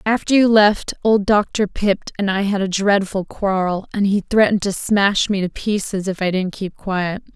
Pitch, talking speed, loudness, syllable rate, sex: 200 Hz, 205 wpm, -18 LUFS, 4.6 syllables/s, female